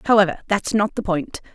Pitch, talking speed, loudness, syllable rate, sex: 195 Hz, 195 wpm, -20 LUFS, 6.0 syllables/s, female